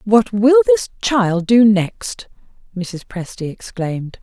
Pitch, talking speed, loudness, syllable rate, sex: 215 Hz, 130 wpm, -16 LUFS, 3.4 syllables/s, female